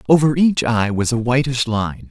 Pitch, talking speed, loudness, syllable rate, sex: 125 Hz, 200 wpm, -17 LUFS, 4.7 syllables/s, male